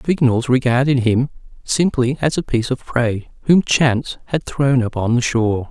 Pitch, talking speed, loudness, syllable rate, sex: 125 Hz, 180 wpm, -18 LUFS, 5.1 syllables/s, male